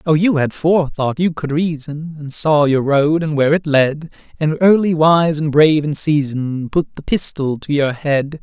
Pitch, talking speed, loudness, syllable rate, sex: 150 Hz, 200 wpm, -16 LUFS, 4.6 syllables/s, male